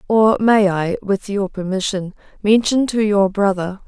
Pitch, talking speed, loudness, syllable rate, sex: 200 Hz, 155 wpm, -17 LUFS, 4.2 syllables/s, female